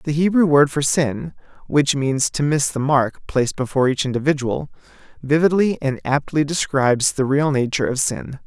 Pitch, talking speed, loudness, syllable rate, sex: 140 Hz, 170 wpm, -19 LUFS, 3.4 syllables/s, male